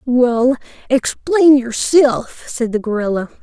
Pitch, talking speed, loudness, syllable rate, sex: 250 Hz, 105 wpm, -15 LUFS, 3.5 syllables/s, female